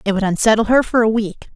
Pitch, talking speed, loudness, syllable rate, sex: 215 Hz, 270 wpm, -16 LUFS, 6.5 syllables/s, female